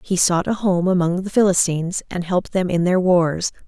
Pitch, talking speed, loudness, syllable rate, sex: 180 Hz, 210 wpm, -19 LUFS, 5.3 syllables/s, female